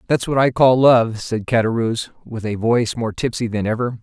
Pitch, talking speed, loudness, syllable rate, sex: 115 Hz, 210 wpm, -18 LUFS, 5.5 syllables/s, male